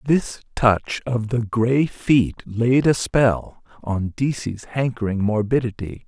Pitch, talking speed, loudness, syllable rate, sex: 120 Hz, 130 wpm, -21 LUFS, 3.5 syllables/s, male